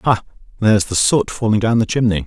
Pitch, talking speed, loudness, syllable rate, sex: 105 Hz, 210 wpm, -16 LUFS, 6.0 syllables/s, male